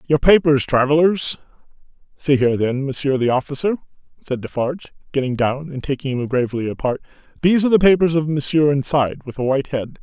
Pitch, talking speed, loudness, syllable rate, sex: 140 Hz, 175 wpm, -19 LUFS, 6.3 syllables/s, male